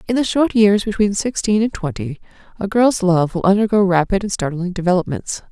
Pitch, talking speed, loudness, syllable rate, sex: 200 Hz, 185 wpm, -17 LUFS, 5.5 syllables/s, female